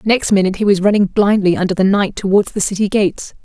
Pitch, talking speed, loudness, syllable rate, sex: 200 Hz, 225 wpm, -14 LUFS, 6.4 syllables/s, female